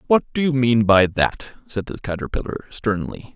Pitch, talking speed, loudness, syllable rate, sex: 115 Hz, 180 wpm, -20 LUFS, 4.8 syllables/s, male